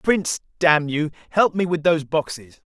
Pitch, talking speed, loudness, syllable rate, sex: 160 Hz, 175 wpm, -21 LUFS, 5.0 syllables/s, male